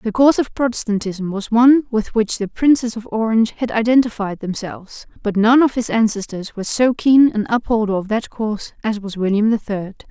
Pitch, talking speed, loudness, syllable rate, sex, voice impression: 220 Hz, 195 wpm, -17 LUFS, 5.4 syllables/s, female, very feminine, slightly young, slightly adult-like, thin, tensed, slightly powerful, bright, hard, clear, very fluent, cute, slightly cool, intellectual, refreshing, sincere, very calm, very friendly, very reassuring, very elegant, slightly lively, slightly strict, slightly sharp